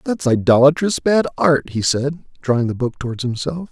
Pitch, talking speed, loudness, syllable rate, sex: 140 Hz, 180 wpm, -17 LUFS, 5.2 syllables/s, male